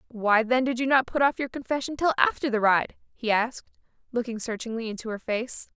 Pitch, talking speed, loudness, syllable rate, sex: 240 Hz, 205 wpm, -25 LUFS, 5.9 syllables/s, female